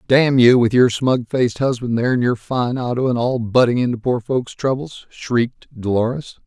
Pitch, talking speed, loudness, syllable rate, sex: 125 Hz, 205 wpm, -18 LUFS, 5.0 syllables/s, male